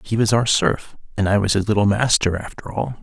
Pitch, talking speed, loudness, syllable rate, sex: 105 Hz, 240 wpm, -19 LUFS, 5.5 syllables/s, male